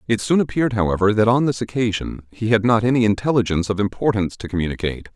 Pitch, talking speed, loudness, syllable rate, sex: 110 Hz, 200 wpm, -19 LUFS, 7.1 syllables/s, male